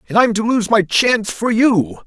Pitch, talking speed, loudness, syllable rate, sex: 210 Hz, 230 wpm, -15 LUFS, 4.8 syllables/s, male